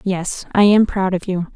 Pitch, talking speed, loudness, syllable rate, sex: 190 Hz, 230 wpm, -17 LUFS, 4.6 syllables/s, female